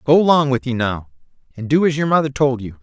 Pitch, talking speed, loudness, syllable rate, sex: 130 Hz, 255 wpm, -17 LUFS, 5.7 syllables/s, male